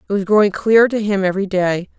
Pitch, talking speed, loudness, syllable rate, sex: 200 Hz, 240 wpm, -16 LUFS, 6.9 syllables/s, female